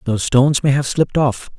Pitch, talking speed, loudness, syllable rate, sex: 135 Hz, 225 wpm, -16 LUFS, 6.5 syllables/s, male